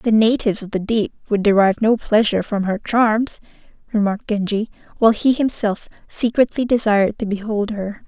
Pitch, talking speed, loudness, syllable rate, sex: 215 Hz, 165 wpm, -18 LUFS, 5.6 syllables/s, female